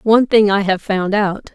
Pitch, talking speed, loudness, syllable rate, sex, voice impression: 205 Hz, 235 wpm, -15 LUFS, 4.9 syllables/s, female, very gender-neutral, young, slightly thin, slightly tensed, slightly weak, slightly dark, slightly soft, clear, fluent, slightly cute, slightly cool, intellectual, slightly refreshing, slightly sincere, calm, very friendly, slightly reassuring, slightly lively, slightly kind